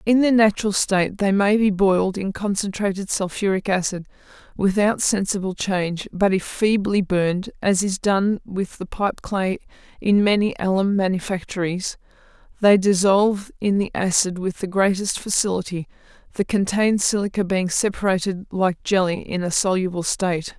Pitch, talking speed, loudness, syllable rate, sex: 195 Hz, 145 wpm, -21 LUFS, 5.0 syllables/s, female